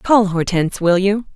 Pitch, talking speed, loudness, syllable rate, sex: 195 Hz, 175 wpm, -16 LUFS, 4.8 syllables/s, female